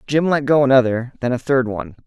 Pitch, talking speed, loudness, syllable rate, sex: 130 Hz, 235 wpm, -17 LUFS, 6.3 syllables/s, male